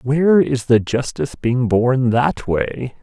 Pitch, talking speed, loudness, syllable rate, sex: 130 Hz, 160 wpm, -17 LUFS, 3.8 syllables/s, male